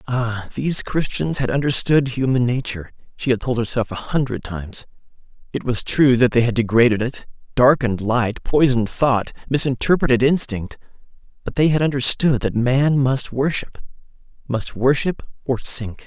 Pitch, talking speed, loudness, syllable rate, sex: 125 Hz, 150 wpm, -19 LUFS, 5.0 syllables/s, male